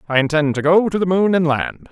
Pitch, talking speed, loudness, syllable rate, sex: 165 Hz, 280 wpm, -17 LUFS, 5.8 syllables/s, male